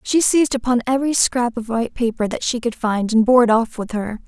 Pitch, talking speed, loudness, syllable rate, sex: 235 Hz, 255 wpm, -18 LUFS, 5.9 syllables/s, female